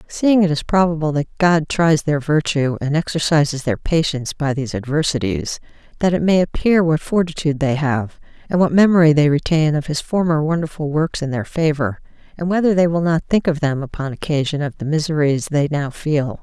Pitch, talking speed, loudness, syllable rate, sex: 155 Hz, 195 wpm, -18 LUFS, 5.5 syllables/s, female